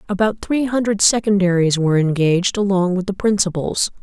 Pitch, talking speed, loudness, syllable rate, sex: 195 Hz, 150 wpm, -17 LUFS, 5.6 syllables/s, female